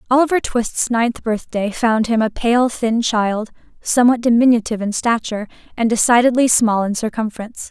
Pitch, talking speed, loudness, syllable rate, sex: 230 Hz, 150 wpm, -17 LUFS, 5.4 syllables/s, female